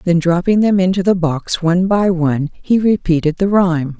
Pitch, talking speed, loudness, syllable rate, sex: 180 Hz, 195 wpm, -15 LUFS, 5.2 syllables/s, female